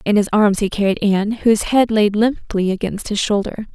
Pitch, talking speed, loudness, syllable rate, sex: 210 Hz, 210 wpm, -17 LUFS, 5.3 syllables/s, female